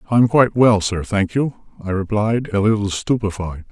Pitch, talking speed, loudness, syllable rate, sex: 105 Hz, 195 wpm, -18 LUFS, 5.2 syllables/s, male